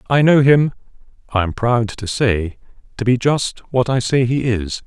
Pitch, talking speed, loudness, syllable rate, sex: 120 Hz, 175 wpm, -17 LUFS, 4.4 syllables/s, male